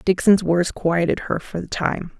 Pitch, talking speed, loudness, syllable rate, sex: 180 Hz, 190 wpm, -20 LUFS, 4.4 syllables/s, female